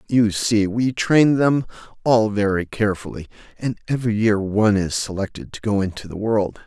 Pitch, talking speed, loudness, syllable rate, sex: 105 Hz, 170 wpm, -20 LUFS, 5.1 syllables/s, male